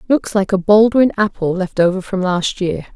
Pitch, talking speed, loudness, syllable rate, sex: 195 Hz, 205 wpm, -16 LUFS, 4.8 syllables/s, female